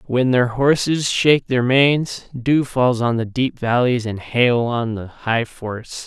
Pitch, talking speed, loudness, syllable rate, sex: 125 Hz, 180 wpm, -18 LUFS, 3.9 syllables/s, male